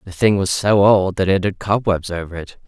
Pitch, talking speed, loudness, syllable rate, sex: 95 Hz, 245 wpm, -17 LUFS, 5.2 syllables/s, male